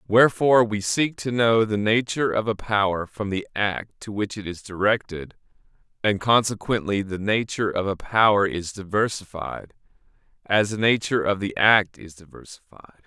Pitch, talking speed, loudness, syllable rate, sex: 105 Hz, 160 wpm, -22 LUFS, 5.1 syllables/s, male